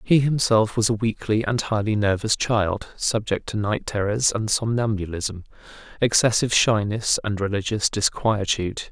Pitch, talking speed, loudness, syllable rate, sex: 110 Hz, 135 wpm, -22 LUFS, 4.7 syllables/s, male